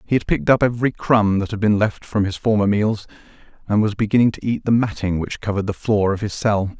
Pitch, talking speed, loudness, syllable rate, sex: 105 Hz, 245 wpm, -19 LUFS, 6.1 syllables/s, male